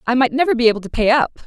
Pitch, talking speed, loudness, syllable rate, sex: 245 Hz, 330 wpm, -16 LUFS, 7.4 syllables/s, female